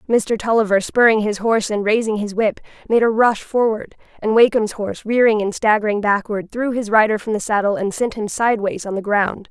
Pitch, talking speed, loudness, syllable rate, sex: 215 Hz, 210 wpm, -18 LUFS, 5.6 syllables/s, female